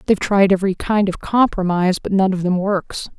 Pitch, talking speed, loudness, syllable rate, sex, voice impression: 190 Hz, 225 wpm, -17 LUFS, 5.8 syllables/s, female, feminine, slightly young, adult-like, slightly thin, tensed, powerful, bright, very hard, clear, fluent, cool, intellectual, slightly refreshing, sincere, very calm, slightly friendly, reassuring, unique, elegant, slightly sweet, slightly lively, slightly strict